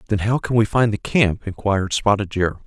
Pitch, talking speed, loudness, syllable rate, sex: 105 Hz, 225 wpm, -20 LUFS, 5.5 syllables/s, male